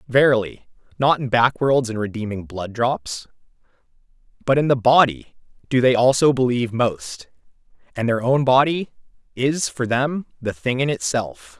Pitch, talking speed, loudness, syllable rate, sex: 125 Hz, 145 wpm, -20 LUFS, 4.6 syllables/s, male